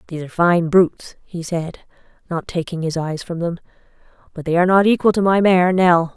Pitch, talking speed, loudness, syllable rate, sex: 175 Hz, 205 wpm, -17 LUFS, 5.7 syllables/s, female